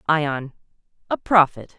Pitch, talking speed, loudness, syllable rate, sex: 150 Hz, 100 wpm, -20 LUFS, 3.7 syllables/s, male